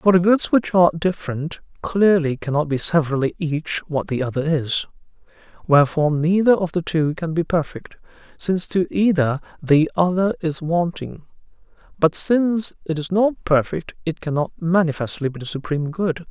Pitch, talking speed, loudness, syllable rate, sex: 165 Hz, 160 wpm, -20 LUFS, 5.1 syllables/s, male